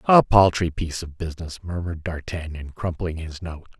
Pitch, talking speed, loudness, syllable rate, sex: 85 Hz, 160 wpm, -24 LUFS, 5.4 syllables/s, male